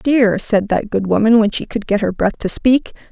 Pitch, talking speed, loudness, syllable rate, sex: 215 Hz, 250 wpm, -16 LUFS, 4.8 syllables/s, female